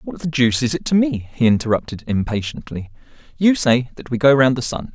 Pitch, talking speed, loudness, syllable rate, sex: 130 Hz, 220 wpm, -18 LUFS, 5.8 syllables/s, male